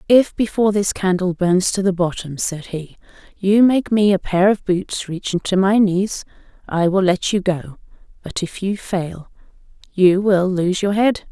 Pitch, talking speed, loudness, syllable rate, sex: 190 Hz, 185 wpm, -18 LUFS, 4.3 syllables/s, female